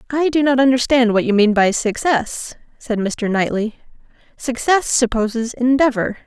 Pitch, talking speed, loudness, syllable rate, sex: 240 Hz, 145 wpm, -17 LUFS, 4.6 syllables/s, female